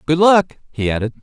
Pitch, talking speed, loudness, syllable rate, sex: 150 Hz, 195 wpm, -16 LUFS, 5.3 syllables/s, male